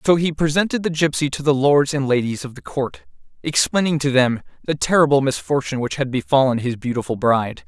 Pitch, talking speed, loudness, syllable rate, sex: 140 Hz, 195 wpm, -19 LUFS, 5.9 syllables/s, male